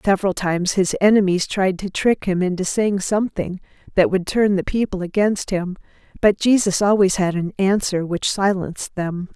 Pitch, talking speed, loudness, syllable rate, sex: 190 Hz, 175 wpm, -19 LUFS, 5.0 syllables/s, female